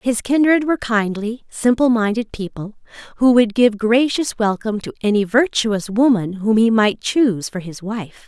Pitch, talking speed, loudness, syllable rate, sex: 225 Hz, 165 wpm, -17 LUFS, 4.7 syllables/s, female